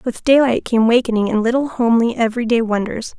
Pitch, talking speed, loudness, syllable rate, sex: 235 Hz, 190 wpm, -16 LUFS, 6.2 syllables/s, female